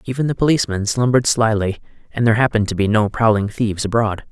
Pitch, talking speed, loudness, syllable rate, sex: 110 Hz, 195 wpm, -17 LUFS, 7.0 syllables/s, male